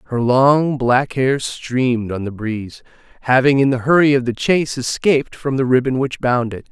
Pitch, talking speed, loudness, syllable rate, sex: 130 Hz, 195 wpm, -17 LUFS, 5.0 syllables/s, male